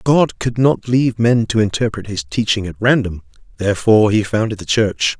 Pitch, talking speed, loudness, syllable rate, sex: 110 Hz, 175 wpm, -16 LUFS, 5.3 syllables/s, male